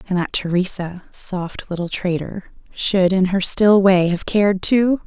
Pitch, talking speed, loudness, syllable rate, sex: 185 Hz, 165 wpm, -18 LUFS, 4.2 syllables/s, female